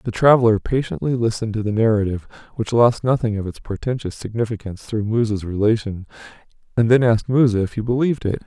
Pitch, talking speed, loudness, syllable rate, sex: 110 Hz, 175 wpm, -19 LUFS, 6.5 syllables/s, male